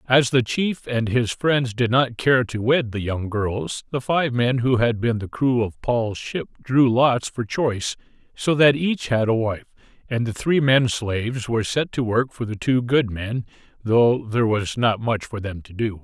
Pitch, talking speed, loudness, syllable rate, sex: 120 Hz, 215 wpm, -21 LUFS, 4.3 syllables/s, male